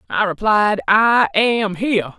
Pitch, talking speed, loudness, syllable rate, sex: 205 Hz, 140 wpm, -16 LUFS, 3.8 syllables/s, female